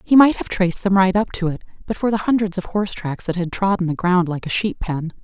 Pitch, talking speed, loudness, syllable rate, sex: 190 Hz, 285 wpm, -20 LUFS, 6.0 syllables/s, female